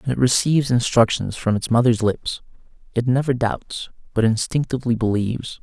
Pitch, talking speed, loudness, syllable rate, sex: 120 Hz, 150 wpm, -20 LUFS, 5.5 syllables/s, male